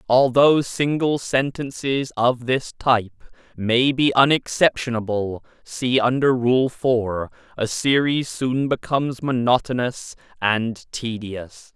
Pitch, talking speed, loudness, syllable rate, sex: 125 Hz, 100 wpm, -21 LUFS, 3.5 syllables/s, male